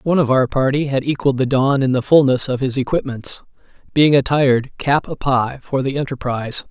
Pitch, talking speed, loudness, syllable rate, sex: 135 Hz, 195 wpm, -17 LUFS, 5.7 syllables/s, male